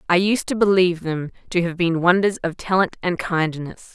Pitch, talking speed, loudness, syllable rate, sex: 175 Hz, 200 wpm, -20 LUFS, 5.1 syllables/s, female